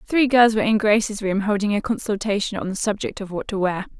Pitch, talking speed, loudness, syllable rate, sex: 210 Hz, 255 wpm, -21 LUFS, 6.4 syllables/s, female